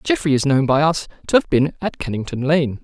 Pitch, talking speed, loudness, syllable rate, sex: 145 Hz, 235 wpm, -19 LUFS, 5.5 syllables/s, male